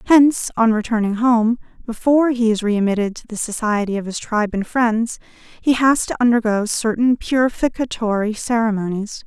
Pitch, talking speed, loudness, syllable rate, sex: 225 Hz, 150 wpm, -18 LUFS, 5.2 syllables/s, female